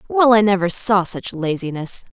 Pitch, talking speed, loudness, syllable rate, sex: 200 Hz, 170 wpm, -17 LUFS, 4.8 syllables/s, female